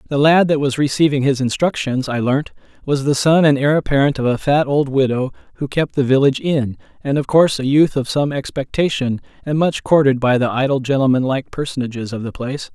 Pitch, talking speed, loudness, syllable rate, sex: 140 Hz, 210 wpm, -17 LUFS, 5.7 syllables/s, male